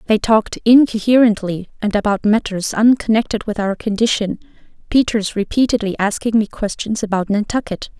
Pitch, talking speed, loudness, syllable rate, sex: 215 Hz, 130 wpm, -17 LUFS, 5.4 syllables/s, female